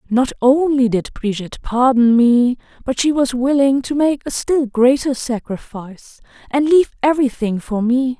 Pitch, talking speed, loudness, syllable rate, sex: 255 Hz, 155 wpm, -16 LUFS, 4.7 syllables/s, female